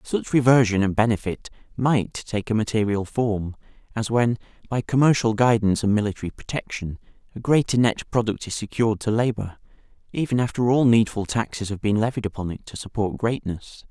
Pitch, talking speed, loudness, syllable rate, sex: 110 Hz, 165 wpm, -23 LUFS, 5.5 syllables/s, male